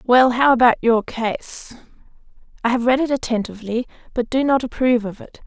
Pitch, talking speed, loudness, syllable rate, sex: 240 Hz, 175 wpm, -19 LUFS, 5.6 syllables/s, female